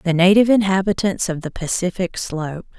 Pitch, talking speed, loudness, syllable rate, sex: 185 Hz, 150 wpm, -19 LUFS, 5.7 syllables/s, female